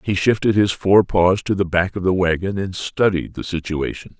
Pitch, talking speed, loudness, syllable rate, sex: 95 Hz, 215 wpm, -19 LUFS, 4.9 syllables/s, male